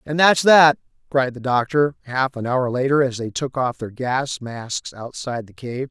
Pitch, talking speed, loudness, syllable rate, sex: 130 Hz, 205 wpm, -20 LUFS, 4.5 syllables/s, male